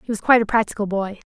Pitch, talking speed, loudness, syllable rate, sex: 210 Hz, 275 wpm, -19 LUFS, 8.0 syllables/s, female